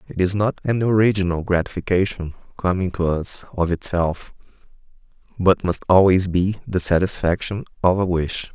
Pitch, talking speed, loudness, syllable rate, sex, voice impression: 90 Hz, 140 wpm, -20 LUFS, 5.0 syllables/s, male, very masculine, adult-like, slightly middle-aged, thick, slightly tensed, slightly powerful, bright, slightly hard, clear, slightly fluent, cool, slightly intellectual, slightly refreshing, very sincere, calm, slightly mature, slightly friendly, reassuring, slightly unique, slightly wild, kind, very modest